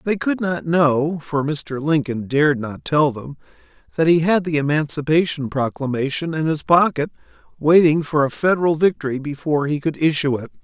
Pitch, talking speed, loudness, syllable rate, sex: 150 Hz, 170 wpm, -19 LUFS, 5.2 syllables/s, male